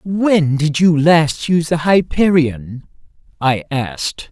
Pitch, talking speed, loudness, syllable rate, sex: 155 Hz, 125 wpm, -15 LUFS, 3.5 syllables/s, male